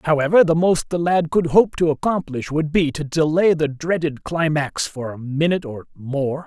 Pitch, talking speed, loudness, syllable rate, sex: 155 Hz, 195 wpm, -19 LUFS, 4.8 syllables/s, male